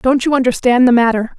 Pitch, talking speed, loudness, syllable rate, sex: 250 Hz, 215 wpm, -13 LUFS, 6.0 syllables/s, female